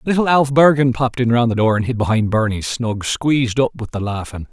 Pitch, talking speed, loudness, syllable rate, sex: 120 Hz, 240 wpm, -17 LUFS, 5.7 syllables/s, male